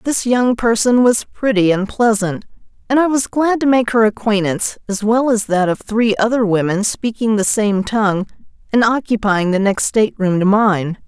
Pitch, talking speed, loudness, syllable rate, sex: 215 Hz, 185 wpm, -15 LUFS, 4.8 syllables/s, female